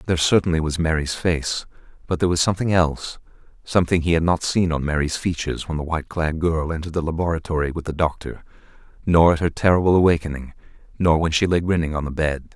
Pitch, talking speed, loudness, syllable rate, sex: 80 Hz, 200 wpm, -21 LUFS, 6.6 syllables/s, male